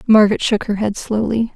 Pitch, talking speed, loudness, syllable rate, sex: 215 Hz, 195 wpm, -17 LUFS, 5.7 syllables/s, female